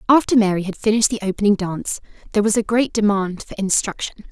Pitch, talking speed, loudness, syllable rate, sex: 210 Hz, 195 wpm, -19 LUFS, 7.0 syllables/s, female